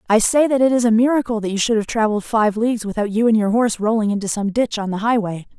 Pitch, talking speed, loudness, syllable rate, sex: 220 Hz, 280 wpm, -18 LUFS, 6.8 syllables/s, female